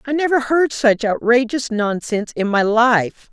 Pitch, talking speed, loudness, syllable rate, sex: 235 Hz, 165 wpm, -17 LUFS, 4.5 syllables/s, female